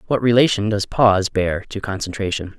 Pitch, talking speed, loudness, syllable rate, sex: 105 Hz, 165 wpm, -19 LUFS, 5.4 syllables/s, male